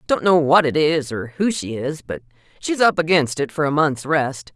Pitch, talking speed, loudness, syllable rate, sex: 150 Hz, 235 wpm, -19 LUFS, 4.7 syllables/s, female